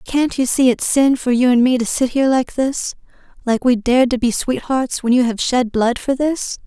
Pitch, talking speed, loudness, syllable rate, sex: 250 Hz, 235 wpm, -17 LUFS, 5.0 syllables/s, female